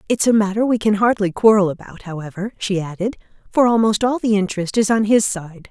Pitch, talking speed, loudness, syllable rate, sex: 205 Hz, 210 wpm, -18 LUFS, 5.9 syllables/s, female